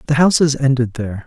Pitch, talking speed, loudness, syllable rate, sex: 135 Hz, 190 wpm, -16 LUFS, 6.4 syllables/s, male